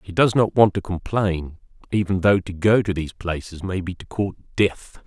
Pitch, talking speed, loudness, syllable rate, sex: 95 Hz, 215 wpm, -22 LUFS, 5.0 syllables/s, male